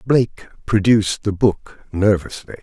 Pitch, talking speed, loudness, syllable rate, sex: 100 Hz, 115 wpm, -18 LUFS, 4.7 syllables/s, male